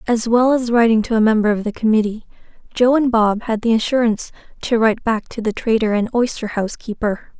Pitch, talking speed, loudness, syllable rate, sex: 225 Hz, 210 wpm, -17 LUFS, 6.0 syllables/s, female